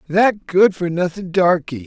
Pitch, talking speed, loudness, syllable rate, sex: 180 Hz, 160 wpm, -17 LUFS, 4.1 syllables/s, male